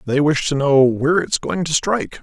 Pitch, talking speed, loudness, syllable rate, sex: 150 Hz, 270 wpm, -17 LUFS, 5.7 syllables/s, male